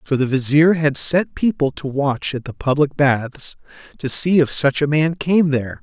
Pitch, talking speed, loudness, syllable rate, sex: 145 Hz, 205 wpm, -17 LUFS, 4.6 syllables/s, male